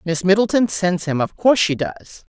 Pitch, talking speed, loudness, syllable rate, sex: 185 Hz, 205 wpm, -18 LUFS, 5.1 syllables/s, female